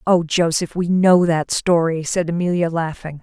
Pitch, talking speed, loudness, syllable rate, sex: 170 Hz, 165 wpm, -18 LUFS, 4.5 syllables/s, female